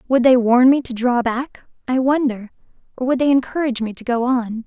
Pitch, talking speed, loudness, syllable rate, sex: 250 Hz, 220 wpm, -18 LUFS, 5.4 syllables/s, female